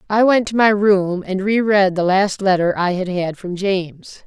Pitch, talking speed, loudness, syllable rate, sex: 195 Hz, 225 wpm, -17 LUFS, 4.4 syllables/s, female